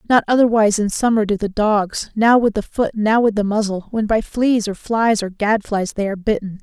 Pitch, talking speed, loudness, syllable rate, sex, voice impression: 215 Hz, 225 wpm, -18 LUFS, 5.2 syllables/s, female, feminine, adult-like, slightly muffled, slightly intellectual, calm